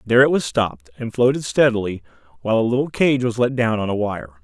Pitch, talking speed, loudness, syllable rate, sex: 115 Hz, 230 wpm, -19 LUFS, 6.4 syllables/s, male